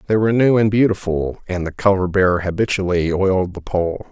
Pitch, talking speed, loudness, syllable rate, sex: 95 Hz, 190 wpm, -18 LUFS, 5.7 syllables/s, male